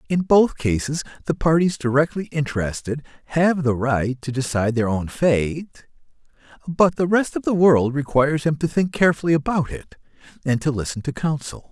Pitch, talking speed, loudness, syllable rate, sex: 145 Hz, 170 wpm, -21 LUFS, 5.2 syllables/s, male